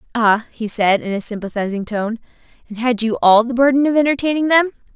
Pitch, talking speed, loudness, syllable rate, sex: 235 Hz, 195 wpm, -17 LUFS, 5.9 syllables/s, female